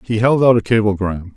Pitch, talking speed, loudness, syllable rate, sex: 110 Hz, 220 wpm, -15 LUFS, 5.7 syllables/s, male